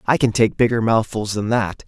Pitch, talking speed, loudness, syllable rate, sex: 110 Hz, 225 wpm, -19 LUFS, 5.2 syllables/s, male